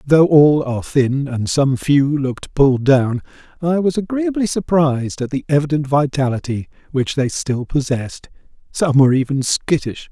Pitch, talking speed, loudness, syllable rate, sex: 140 Hz, 150 wpm, -17 LUFS, 4.8 syllables/s, male